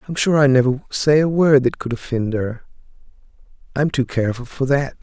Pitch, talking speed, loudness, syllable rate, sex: 135 Hz, 190 wpm, -18 LUFS, 5.5 syllables/s, male